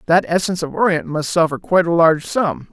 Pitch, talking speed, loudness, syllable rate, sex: 165 Hz, 245 wpm, -17 LUFS, 6.3 syllables/s, male